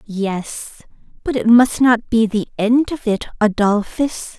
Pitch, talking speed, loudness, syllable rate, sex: 225 Hz, 150 wpm, -17 LUFS, 3.7 syllables/s, female